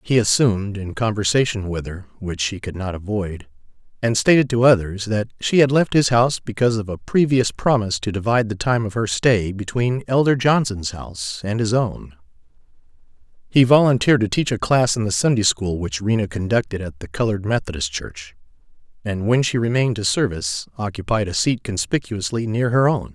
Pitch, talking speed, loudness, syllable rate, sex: 110 Hz, 185 wpm, -20 LUFS, 5.5 syllables/s, male